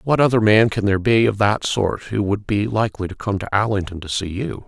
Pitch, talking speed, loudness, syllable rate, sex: 105 Hz, 255 wpm, -19 LUFS, 5.8 syllables/s, male